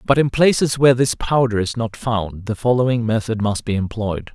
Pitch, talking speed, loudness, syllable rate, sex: 115 Hz, 205 wpm, -18 LUFS, 5.2 syllables/s, male